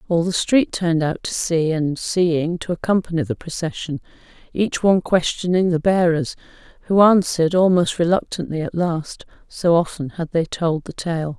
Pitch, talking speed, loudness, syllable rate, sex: 170 Hz, 165 wpm, -19 LUFS, 4.8 syllables/s, female